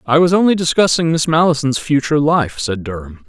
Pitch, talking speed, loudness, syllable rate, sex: 150 Hz, 185 wpm, -15 LUFS, 5.7 syllables/s, male